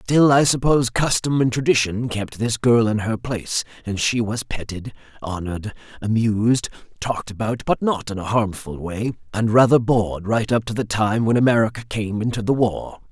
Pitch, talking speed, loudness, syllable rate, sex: 115 Hz, 185 wpm, -20 LUFS, 5.2 syllables/s, male